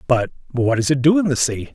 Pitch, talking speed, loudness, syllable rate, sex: 135 Hz, 275 wpm, -18 LUFS, 5.9 syllables/s, male